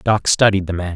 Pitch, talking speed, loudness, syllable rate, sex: 95 Hz, 250 wpm, -16 LUFS, 5.6 syllables/s, male